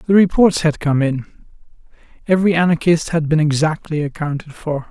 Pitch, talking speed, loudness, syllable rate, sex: 160 Hz, 145 wpm, -17 LUFS, 5.7 syllables/s, male